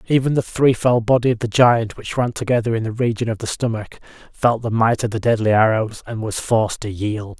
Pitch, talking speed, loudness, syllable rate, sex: 115 Hz, 225 wpm, -19 LUFS, 5.5 syllables/s, male